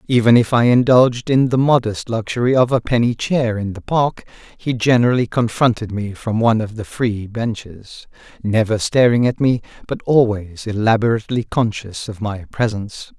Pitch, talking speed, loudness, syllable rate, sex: 115 Hz, 165 wpm, -17 LUFS, 5.1 syllables/s, male